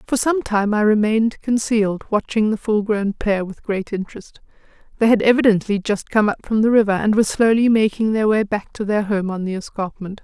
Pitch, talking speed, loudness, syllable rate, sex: 210 Hz, 210 wpm, -19 LUFS, 5.5 syllables/s, female